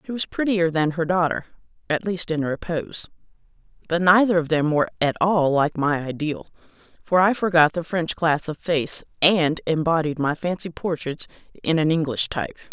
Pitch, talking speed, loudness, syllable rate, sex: 165 Hz, 175 wpm, -22 LUFS, 5.2 syllables/s, female